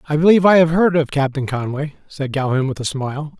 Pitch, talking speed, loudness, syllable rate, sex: 145 Hz, 230 wpm, -17 LUFS, 6.2 syllables/s, male